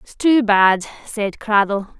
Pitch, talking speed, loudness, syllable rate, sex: 215 Hz, 150 wpm, -17 LUFS, 3.5 syllables/s, female